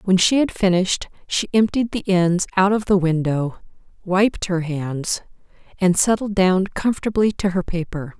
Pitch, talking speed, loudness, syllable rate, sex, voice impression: 190 Hz, 160 wpm, -20 LUFS, 4.6 syllables/s, female, very feminine, adult-like, slightly calm, slightly sweet